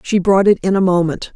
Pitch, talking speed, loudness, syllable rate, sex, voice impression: 185 Hz, 265 wpm, -14 LUFS, 5.6 syllables/s, female, very feminine, adult-like, slightly middle-aged, thin, tensed, powerful, slightly bright, slightly soft, clear, fluent, cool, very intellectual, refreshing, very sincere, calm, friendly, reassuring, slightly unique, elegant, wild, sweet, slightly strict, slightly intense